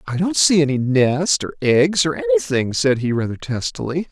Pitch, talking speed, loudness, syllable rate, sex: 140 Hz, 190 wpm, -18 LUFS, 4.9 syllables/s, male